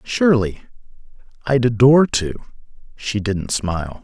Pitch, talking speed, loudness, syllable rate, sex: 115 Hz, 105 wpm, -18 LUFS, 4.4 syllables/s, male